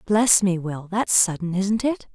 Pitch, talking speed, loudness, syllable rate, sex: 190 Hz, 195 wpm, -21 LUFS, 4.1 syllables/s, female